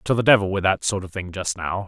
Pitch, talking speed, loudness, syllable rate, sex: 95 Hz, 320 wpm, -21 LUFS, 6.2 syllables/s, male